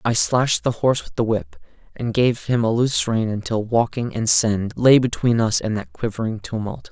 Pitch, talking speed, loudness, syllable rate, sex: 115 Hz, 210 wpm, -20 LUFS, 5.1 syllables/s, male